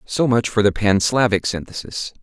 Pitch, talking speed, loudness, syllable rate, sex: 110 Hz, 190 wpm, -19 LUFS, 4.9 syllables/s, male